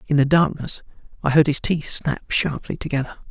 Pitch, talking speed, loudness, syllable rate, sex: 150 Hz, 180 wpm, -21 LUFS, 5.3 syllables/s, male